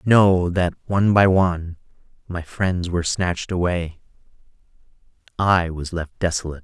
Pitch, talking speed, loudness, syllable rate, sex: 90 Hz, 125 wpm, -20 LUFS, 4.9 syllables/s, male